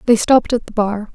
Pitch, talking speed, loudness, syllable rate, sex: 220 Hz, 260 wpm, -16 LUFS, 6.1 syllables/s, female